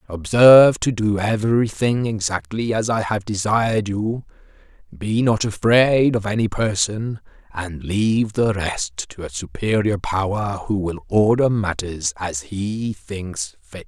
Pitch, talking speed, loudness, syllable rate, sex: 105 Hz, 140 wpm, -20 LUFS, 4.0 syllables/s, male